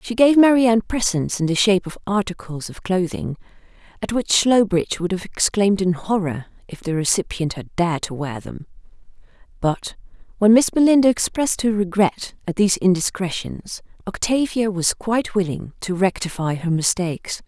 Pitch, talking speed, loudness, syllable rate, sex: 195 Hz, 160 wpm, -20 LUFS, 5.3 syllables/s, female